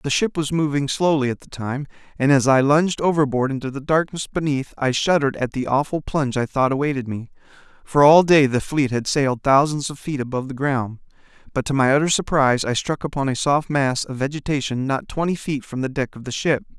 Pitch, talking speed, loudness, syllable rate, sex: 140 Hz, 220 wpm, -20 LUFS, 5.8 syllables/s, male